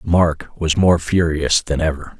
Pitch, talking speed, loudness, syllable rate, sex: 80 Hz, 165 wpm, -17 LUFS, 4.0 syllables/s, male